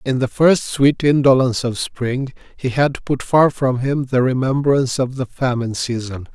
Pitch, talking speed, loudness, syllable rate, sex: 130 Hz, 180 wpm, -18 LUFS, 4.7 syllables/s, male